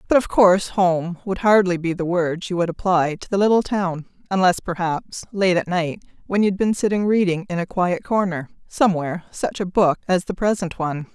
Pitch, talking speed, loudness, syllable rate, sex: 185 Hz, 205 wpm, -20 LUFS, 5.2 syllables/s, female